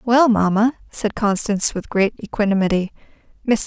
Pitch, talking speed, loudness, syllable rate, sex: 215 Hz, 115 wpm, -19 LUFS, 5.3 syllables/s, female